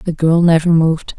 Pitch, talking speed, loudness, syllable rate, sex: 165 Hz, 205 wpm, -13 LUFS, 5.2 syllables/s, female